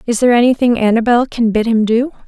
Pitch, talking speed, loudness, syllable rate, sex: 235 Hz, 210 wpm, -13 LUFS, 6.6 syllables/s, female